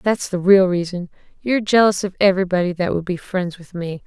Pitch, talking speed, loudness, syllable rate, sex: 185 Hz, 205 wpm, -18 LUFS, 5.8 syllables/s, female